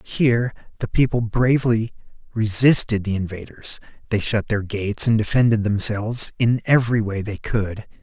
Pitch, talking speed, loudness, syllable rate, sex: 110 Hz, 140 wpm, -20 LUFS, 5.1 syllables/s, male